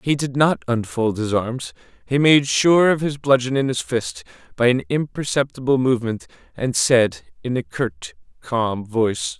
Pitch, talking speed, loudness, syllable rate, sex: 130 Hz, 165 wpm, -20 LUFS, 4.4 syllables/s, male